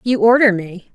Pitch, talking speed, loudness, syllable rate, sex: 215 Hz, 190 wpm, -14 LUFS, 4.8 syllables/s, female